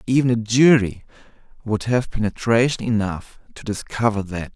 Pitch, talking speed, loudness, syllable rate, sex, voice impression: 110 Hz, 130 wpm, -20 LUFS, 4.9 syllables/s, male, very masculine, very adult-like, thick, slightly tensed, slightly weak, slightly bright, soft, slightly muffled, fluent, slightly raspy, slightly cool, intellectual, slightly refreshing, sincere, very calm, very mature, friendly, reassuring, unique, slightly elegant, slightly wild, slightly sweet, slightly lively, slightly strict, slightly intense